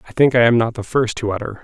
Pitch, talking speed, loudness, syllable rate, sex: 115 Hz, 330 wpm, -17 LUFS, 7.0 syllables/s, male